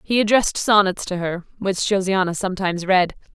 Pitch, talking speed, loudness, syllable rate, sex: 190 Hz, 160 wpm, -20 LUFS, 5.8 syllables/s, female